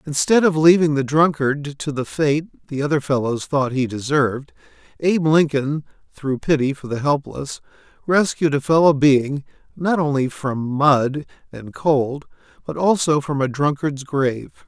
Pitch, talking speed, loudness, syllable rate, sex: 145 Hz, 150 wpm, -19 LUFS, 4.4 syllables/s, male